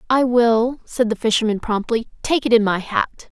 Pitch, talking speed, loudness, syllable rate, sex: 230 Hz, 195 wpm, -19 LUFS, 4.8 syllables/s, female